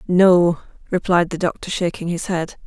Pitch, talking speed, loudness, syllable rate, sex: 175 Hz, 155 wpm, -19 LUFS, 4.6 syllables/s, female